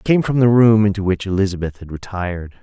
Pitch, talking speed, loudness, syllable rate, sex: 100 Hz, 230 wpm, -17 LUFS, 6.2 syllables/s, male